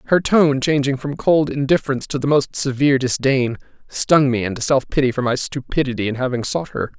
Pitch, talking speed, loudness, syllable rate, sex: 135 Hz, 200 wpm, -18 LUFS, 5.8 syllables/s, male